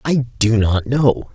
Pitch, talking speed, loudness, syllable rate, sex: 120 Hz, 180 wpm, -17 LUFS, 3.2 syllables/s, male